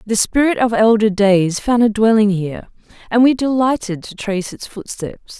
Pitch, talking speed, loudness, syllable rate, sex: 215 Hz, 180 wpm, -16 LUFS, 4.9 syllables/s, female